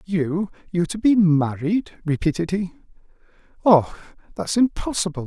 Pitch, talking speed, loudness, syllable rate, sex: 180 Hz, 115 wpm, -21 LUFS, 4.5 syllables/s, male